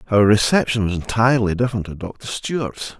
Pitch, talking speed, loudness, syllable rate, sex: 110 Hz, 160 wpm, -19 LUFS, 6.1 syllables/s, male